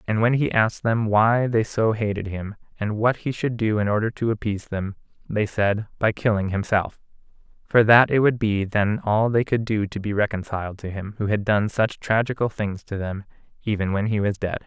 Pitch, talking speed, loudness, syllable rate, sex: 105 Hz, 215 wpm, -22 LUFS, 5.2 syllables/s, male